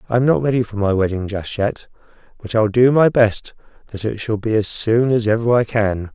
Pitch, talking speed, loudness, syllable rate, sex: 110 Hz, 235 wpm, -18 LUFS, 5.3 syllables/s, male